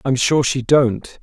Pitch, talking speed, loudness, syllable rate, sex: 130 Hz, 195 wpm, -16 LUFS, 3.5 syllables/s, male